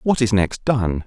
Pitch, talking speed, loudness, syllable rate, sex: 110 Hz, 225 wpm, -19 LUFS, 3.9 syllables/s, male